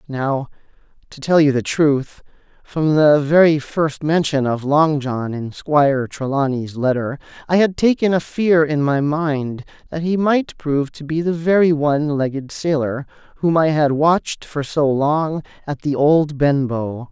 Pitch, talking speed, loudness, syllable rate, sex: 150 Hz, 170 wpm, -18 LUFS, 4.2 syllables/s, male